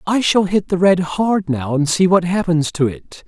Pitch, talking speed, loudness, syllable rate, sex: 175 Hz, 240 wpm, -16 LUFS, 4.5 syllables/s, male